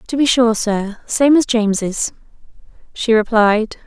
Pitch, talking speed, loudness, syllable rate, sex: 225 Hz, 125 wpm, -16 LUFS, 3.9 syllables/s, female